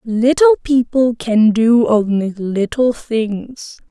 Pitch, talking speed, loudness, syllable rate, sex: 235 Hz, 105 wpm, -15 LUFS, 3.1 syllables/s, female